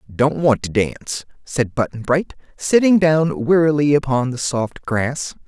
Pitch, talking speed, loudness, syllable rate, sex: 140 Hz, 155 wpm, -18 LUFS, 4.2 syllables/s, male